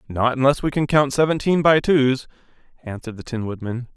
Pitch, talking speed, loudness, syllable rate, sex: 130 Hz, 180 wpm, -19 LUFS, 5.7 syllables/s, male